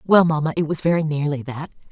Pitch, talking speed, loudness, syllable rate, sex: 155 Hz, 220 wpm, -20 LUFS, 6.3 syllables/s, female